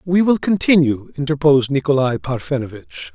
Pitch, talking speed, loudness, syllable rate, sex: 145 Hz, 115 wpm, -17 LUFS, 5.3 syllables/s, male